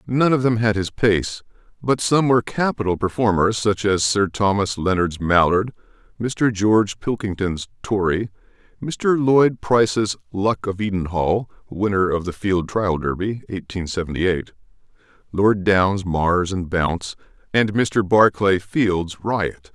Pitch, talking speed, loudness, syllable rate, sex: 100 Hz, 140 wpm, -20 LUFS, 4.2 syllables/s, male